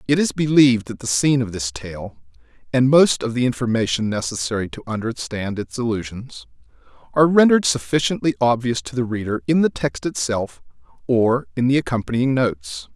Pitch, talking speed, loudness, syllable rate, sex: 115 Hz, 160 wpm, -20 LUFS, 5.6 syllables/s, male